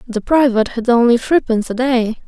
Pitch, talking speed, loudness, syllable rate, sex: 240 Hz, 185 wpm, -15 LUFS, 5.7 syllables/s, female